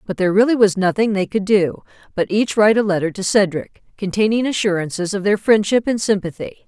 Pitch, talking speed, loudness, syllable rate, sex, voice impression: 200 Hz, 200 wpm, -17 LUFS, 5.9 syllables/s, female, feminine, adult-like, slightly fluent, slightly intellectual, slightly sharp